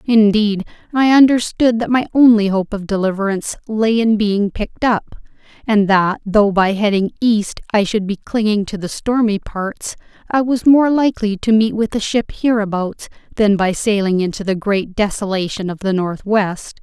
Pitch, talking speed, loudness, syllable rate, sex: 210 Hz, 170 wpm, -16 LUFS, 4.7 syllables/s, female